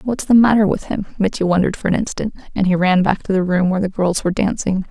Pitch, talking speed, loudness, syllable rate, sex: 195 Hz, 270 wpm, -17 LUFS, 6.7 syllables/s, female